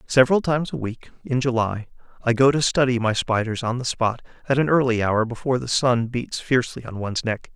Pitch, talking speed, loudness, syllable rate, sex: 125 Hz, 215 wpm, -22 LUFS, 5.9 syllables/s, male